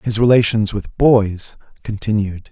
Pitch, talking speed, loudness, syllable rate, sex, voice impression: 105 Hz, 120 wpm, -16 LUFS, 4.2 syllables/s, male, very masculine, very adult-like, very thick, tensed, very powerful, bright, soft, slightly muffled, fluent, slightly raspy, cool, refreshing, sincere, very calm, mature, very friendly, very reassuring, unique, elegant, slightly wild, sweet, lively, very kind, slightly modest